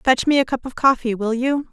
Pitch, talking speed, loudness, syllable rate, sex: 255 Hz, 280 wpm, -19 LUFS, 5.6 syllables/s, female